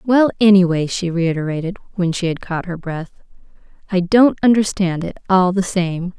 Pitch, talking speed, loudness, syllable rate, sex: 185 Hz, 165 wpm, -17 LUFS, 4.8 syllables/s, female